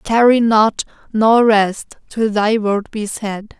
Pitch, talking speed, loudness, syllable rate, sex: 215 Hz, 150 wpm, -15 LUFS, 3.2 syllables/s, female